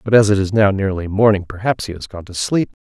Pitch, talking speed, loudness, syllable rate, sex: 100 Hz, 275 wpm, -17 LUFS, 6.1 syllables/s, male